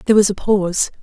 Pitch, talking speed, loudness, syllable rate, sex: 200 Hz, 235 wpm, -16 LUFS, 7.7 syllables/s, female